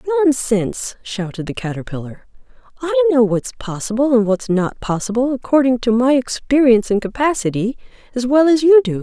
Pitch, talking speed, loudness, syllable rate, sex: 240 Hz, 155 wpm, -17 LUFS, 5.6 syllables/s, female